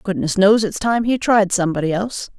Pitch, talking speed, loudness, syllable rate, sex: 200 Hz, 200 wpm, -17 LUFS, 5.8 syllables/s, female